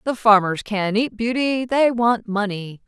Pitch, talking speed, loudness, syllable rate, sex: 220 Hz, 165 wpm, -19 LUFS, 4.0 syllables/s, female